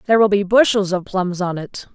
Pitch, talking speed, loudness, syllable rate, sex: 195 Hz, 245 wpm, -17 LUFS, 5.7 syllables/s, female